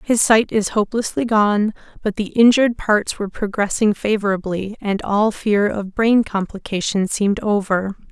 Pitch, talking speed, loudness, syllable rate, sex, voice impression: 210 Hz, 150 wpm, -18 LUFS, 4.8 syllables/s, female, feminine, adult-like, slightly sincere, slightly calm, slightly sweet